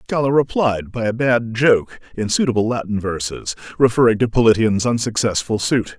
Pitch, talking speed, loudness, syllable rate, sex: 115 Hz, 150 wpm, -18 LUFS, 5.1 syllables/s, male